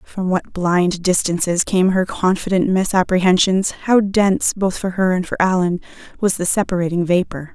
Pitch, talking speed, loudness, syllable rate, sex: 185 Hz, 160 wpm, -17 LUFS, 4.8 syllables/s, female